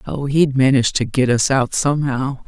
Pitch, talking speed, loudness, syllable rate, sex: 135 Hz, 195 wpm, -17 LUFS, 5.2 syllables/s, female